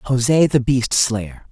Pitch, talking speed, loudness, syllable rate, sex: 125 Hz, 160 wpm, -17 LUFS, 2.7 syllables/s, male